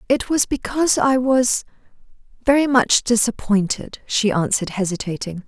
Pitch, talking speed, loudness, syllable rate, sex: 235 Hz, 110 wpm, -19 LUFS, 4.9 syllables/s, female